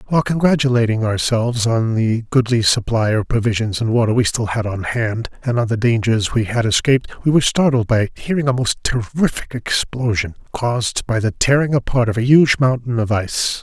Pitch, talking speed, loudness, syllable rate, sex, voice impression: 120 Hz, 190 wpm, -17 LUFS, 5.4 syllables/s, male, masculine, adult-like, slightly thick, slightly muffled, slightly cool, slightly refreshing, sincere